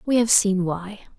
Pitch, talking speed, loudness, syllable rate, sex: 205 Hz, 205 wpm, -19 LUFS, 4.0 syllables/s, female